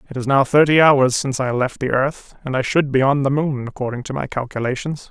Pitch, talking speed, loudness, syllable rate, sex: 135 Hz, 245 wpm, -18 LUFS, 5.8 syllables/s, male